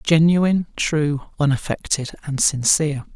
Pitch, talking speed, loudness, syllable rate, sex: 150 Hz, 95 wpm, -20 LUFS, 4.4 syllables/s, male